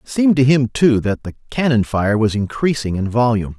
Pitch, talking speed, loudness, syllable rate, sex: 120 Hz, 220 wpm, -17 LUFS, 5.7 syllables/s, male